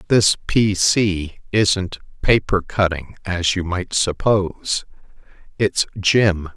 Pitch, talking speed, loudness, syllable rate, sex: 95 Hz, 110 wpm, -19 LUFS, 3.1 syllables/s, male